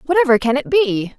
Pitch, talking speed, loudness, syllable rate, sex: 280 Hz, 205 wpm, -16 LUFS, 6.0 syllables/s, female